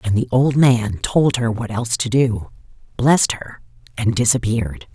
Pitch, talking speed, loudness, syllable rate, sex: 115 Hz, 170 wpm, -18 LUFS, 4.8 syllables/s, female